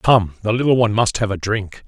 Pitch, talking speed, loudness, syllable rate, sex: 105 Hz, 255 wpm, -18 LUFS, 5.8 syllables/s, male